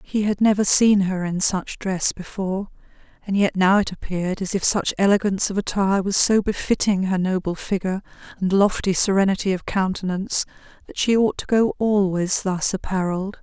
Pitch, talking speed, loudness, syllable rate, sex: 195 Hz, 175 wpm, -21 LUFS, 5.5 syllables/s, female